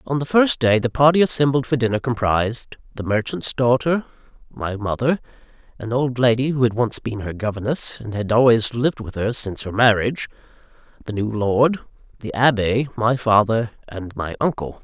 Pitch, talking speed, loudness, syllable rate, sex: 120 Hz, 175 wpm, -19 LUFS, 5.2 syllables/s, male